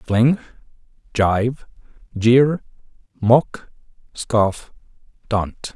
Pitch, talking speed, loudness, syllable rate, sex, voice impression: 115 Hz, 65 wpm, -19 LUFS, 2.0 syllables/s, male, very masculine, middle-aged, thick, slightly fluent, cool, sincere, slightly elegant